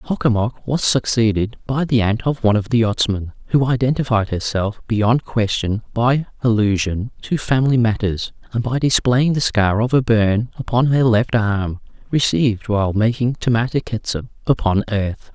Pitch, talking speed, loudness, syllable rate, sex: 115 Hz, 165 wpm, -18 LUFS, 4.8 syllables/s, male